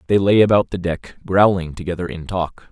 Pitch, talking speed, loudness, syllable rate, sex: 90 Hz, 200 wpm, -18 LUFS, 5.3 syllables/s, male